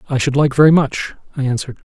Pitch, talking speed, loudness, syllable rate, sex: 140 Hz, 220 wpm, -16 LUFS, 7.3 syllables/s, male